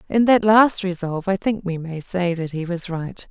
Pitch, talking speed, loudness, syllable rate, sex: 185 Hz, 235 wpm, -20 LUFS, 4.8 syllables/s, female